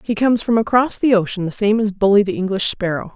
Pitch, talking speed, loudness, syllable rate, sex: 210 Hz, 245 wpm, -17 LUFS, 6.2 syllables/s, female